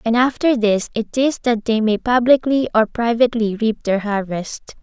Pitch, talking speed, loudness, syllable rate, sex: 230 Hz, 175 wpm, -18 LUFS, 4.7 syllables/s, female